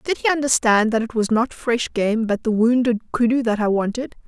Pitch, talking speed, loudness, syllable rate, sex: 230 Hz, 225 wpm, -19 LUFS, 5.2 syllables/s, female